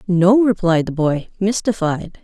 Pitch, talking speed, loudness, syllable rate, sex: 185 Hz, 135 wpm, -17 LUFS, 4.1 syllables/s, female